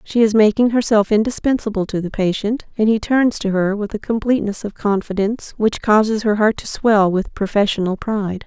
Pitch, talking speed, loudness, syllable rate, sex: 210 Hz, 190 wpm, -18 LUFS, 5.5 syllables/s, female